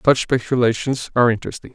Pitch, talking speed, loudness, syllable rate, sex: 125 Hz, 140 wpm, -19 LUFS, 6.8 syllables/s, male